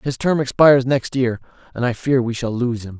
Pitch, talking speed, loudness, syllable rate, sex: 125 Hz, 240 wpm, -18 LUFS, 5.5 syllables/s, male